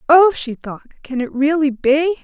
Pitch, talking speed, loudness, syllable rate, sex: 295 Hz, 190 wpm, -17 LUFS, 4.5 syllables/s, female